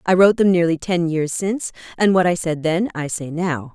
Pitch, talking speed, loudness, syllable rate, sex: 175 Hz, 240 wpm, -19 LUFS, 5.4 syllables/s, female